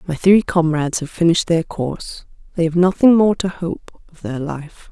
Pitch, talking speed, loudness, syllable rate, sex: 170 Hz, 195 wpm, -17 LUFS, 5.0 syllables/s, female